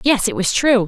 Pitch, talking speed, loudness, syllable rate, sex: 220 Hz, 275 wpm, -16 LUFS, 5.2 syllables/s, female